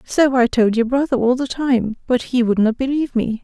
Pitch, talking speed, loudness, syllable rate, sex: 250 Hz, 225 wpm, -18 LUFS, 5.3 syllables/s, female